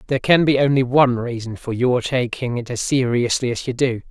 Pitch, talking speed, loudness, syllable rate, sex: 130 Hz, 220 wpm, -19 LUFS, 6.0 syllables/s, female